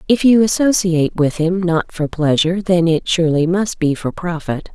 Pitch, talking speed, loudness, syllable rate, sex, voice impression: 175 Hz, 190 wpm, -16 LUFS, 5.1 syllables/s, female, feminine, middle-aged, tensed, powerful, clear, fluent, intellectual, friendly, reassuring, elegant, lively, kind, slightly strict, slightly sharp